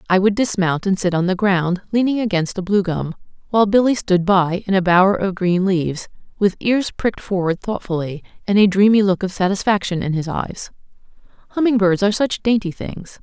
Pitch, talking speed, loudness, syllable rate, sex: 195 Hz, 190 wpm, -18 LUFS, 5.5 syllables/s, female